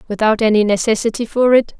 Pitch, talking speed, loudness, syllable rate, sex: 220 Hz, 165 wpm, -15 LUFS, 6.2 syllables/s, female